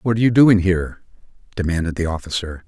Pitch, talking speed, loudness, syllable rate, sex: 90 Hz, 180 wpm, -18 LUFS, 6.7 syllables/s, male